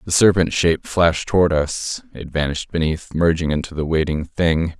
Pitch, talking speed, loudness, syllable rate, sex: 80 Hz, 175 wpm, -19 LUFS, 5.3 syllables/s, male